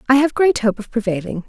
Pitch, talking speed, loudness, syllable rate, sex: 240 Hz, 245 wpm, -18 LUFS, 6.2 syllables/s, female